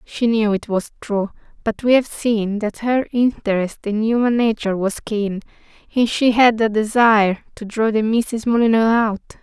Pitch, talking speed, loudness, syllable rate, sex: 220 Hz, 180 wpm, -18 LUFS, 4.7 syllables/s, female